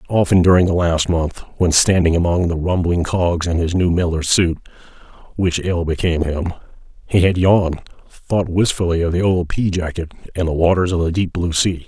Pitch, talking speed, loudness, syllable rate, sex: 85 Hz, 190 wpm, -17 LUFS, 5.4 syllables/s, male